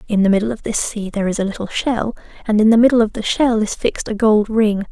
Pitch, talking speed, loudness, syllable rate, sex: 215 Hz, 280 wpm, -17 LUFS, 6.4 syllables/s, female